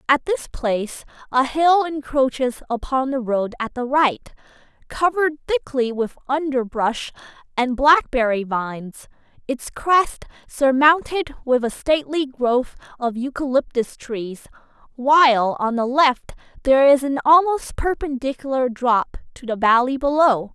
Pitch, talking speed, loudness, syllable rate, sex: 265 Hz, 125 wpm, -20 LUFS, 4.3 syllables/s, female